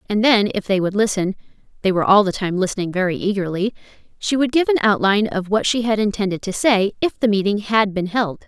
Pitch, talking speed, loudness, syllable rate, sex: 205 Hz, 210 wpm, -19 LUFS, 6.2 syllables/s, female